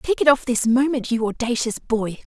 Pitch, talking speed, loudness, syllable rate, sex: 245 Hz, 205 wpm, -20 LUFS, 5.0 syllables/s, female